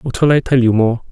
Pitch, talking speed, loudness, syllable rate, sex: 125 Hz, 320 wpm, -14 LUFS, 5.8 syllables/s, male